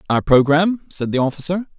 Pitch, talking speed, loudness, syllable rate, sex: 160 Hz, 170 wpm, -17 LUFS, 6.5 syllables/s, male